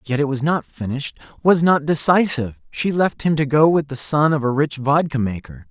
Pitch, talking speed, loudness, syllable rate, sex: 150 Hz, 220 wpm, -18 LUFS, 5.4 syllables/s, male